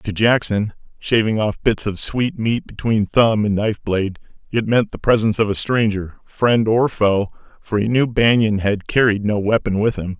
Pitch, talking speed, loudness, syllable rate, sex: 110 Hz, 195 wpm, -18 LUFS, 4.8 syllables/s, male